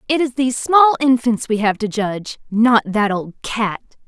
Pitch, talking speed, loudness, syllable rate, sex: 235 Hz, 190 wpm, -17 LUFS, 5.0 syllables/s, female